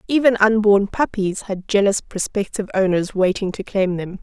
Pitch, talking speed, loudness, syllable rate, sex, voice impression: 200 Hz, 155 wpm, -19 LUFS, 5.0 syllables/s, female, feminine, slightly adult-like, slightly clear, slightly fluent, slightly sincere, friendly